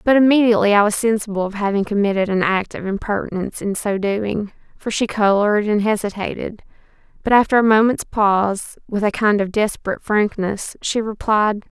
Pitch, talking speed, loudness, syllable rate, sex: 210 Hz, 170 wpm, -18 LUFS, 5.6 syllables/s, female